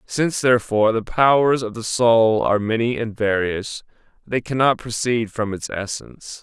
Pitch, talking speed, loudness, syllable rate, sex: 115 Hz, 160 wpm, -20 LUFS, 4.9 syllables/s, male